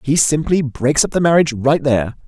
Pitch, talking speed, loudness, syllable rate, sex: 140 Hz, 210 wpm, -15 LUFS, 5.7 syllables/s, male